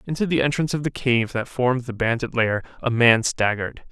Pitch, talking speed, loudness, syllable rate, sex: 125 Hz, 215 wpm, -21 LUFS, 5.9 syllables/s, male